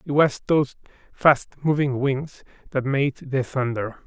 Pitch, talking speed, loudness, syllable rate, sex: 135 Hz, 150 wpm, -23 LUFS, 4.2 syllables/s, male